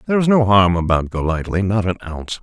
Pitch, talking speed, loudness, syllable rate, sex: 100 Hz, 200 wpm, -17 LUFS, 6.5 syllables/s, male